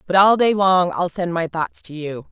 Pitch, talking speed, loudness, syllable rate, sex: 180 Hz, 260 wpm, -18 LUFS, 4.7 syllables/s, female